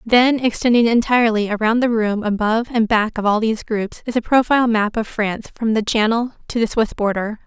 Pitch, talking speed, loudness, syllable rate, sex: 225 Hz, 210 wpm, -18 LUFS, 5.7 syllables/s, female